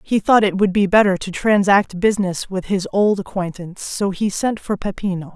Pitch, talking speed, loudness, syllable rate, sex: 195 Hz, 200 wpm, -18 LUFS, 5.2 syllables/s, female